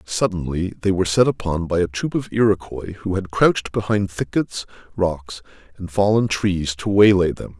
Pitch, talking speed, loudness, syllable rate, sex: 95 Hz, 175 wpm, -20 LUFS, 4.9 syllables/s, male